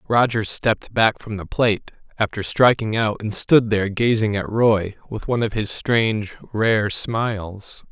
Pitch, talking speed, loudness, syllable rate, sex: 110 Hz, 165 wpm, -20 LUFS, 4.5 syllables/s, male